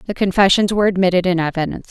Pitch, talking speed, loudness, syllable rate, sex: 185 Hz, 190 wpm, -16 LUFS, 8.0 syllables/s, female